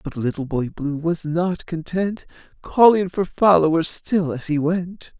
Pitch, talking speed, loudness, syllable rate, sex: 165 Hz, 160 wpm, -20 LUFS, 4.0 syllables/s, male